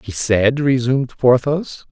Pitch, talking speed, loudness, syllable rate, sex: 130 Hz, 125 wpm, -17 LUFS, 3.9 syllables/s, male